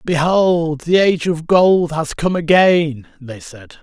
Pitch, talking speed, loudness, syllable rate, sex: 165 Hz, 155 wpm, -15 LUFS, 3.7 syllables/s, male